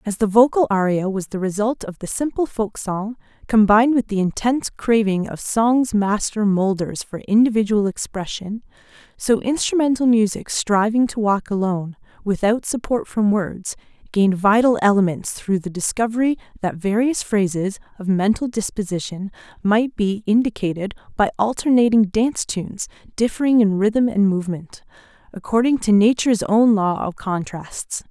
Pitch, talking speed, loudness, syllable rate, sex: 210 Hz, 140 wpm, -19 LUFS, 4.9 syllables/s, female